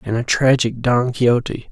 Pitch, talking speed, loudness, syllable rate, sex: 120 Hz, 175 wpm, -17 LUFS, 5.1 syllables/s, male